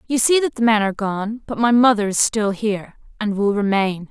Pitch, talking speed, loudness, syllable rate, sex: 215 Hz, 235 wpm, -18 LUFS, 5.4 syllables/s, female